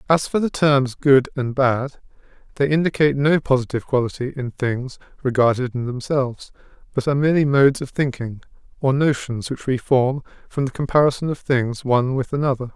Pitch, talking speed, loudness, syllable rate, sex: 135 Hz, 170 wpm, -20 LUFS, 5.6 syllables/s, male